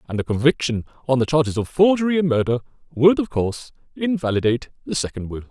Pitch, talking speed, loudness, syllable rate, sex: 135 Hz, 185 wpm, -20 LUFS, 6.6 syllables/s, male